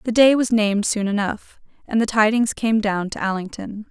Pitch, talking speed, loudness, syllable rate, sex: 215 Hz, 200 wpm, -20 LUFS, 5.1 syllables/s, female